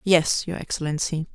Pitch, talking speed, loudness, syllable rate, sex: 165 Hz, 135 wpm, -24 LUFS, 5.0 syllables/s, female